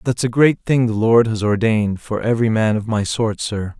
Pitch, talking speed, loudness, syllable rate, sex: 110 Hz, 235 wpm, -18 LUFS, 5.2 syllables/s, male